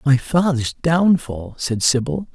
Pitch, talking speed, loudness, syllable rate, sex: 140 Hz, 130 wpm, -18 LUFS, 3.7 syllables/s, male